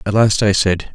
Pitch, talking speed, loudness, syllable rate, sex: 100 Hz, 255 wpm, -15 LUFS, 4.9 syllables/s, male